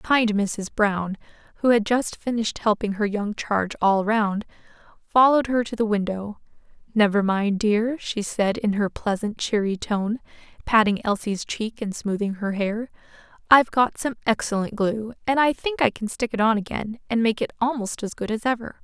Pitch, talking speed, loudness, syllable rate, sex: 220 Hz, 180 wpm, -23 LUFS, 4.9 syllables/s, female